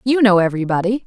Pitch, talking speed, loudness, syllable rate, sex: 205 Hz, 225 wpm, -16 LUFS, 7.2 syllables/s, female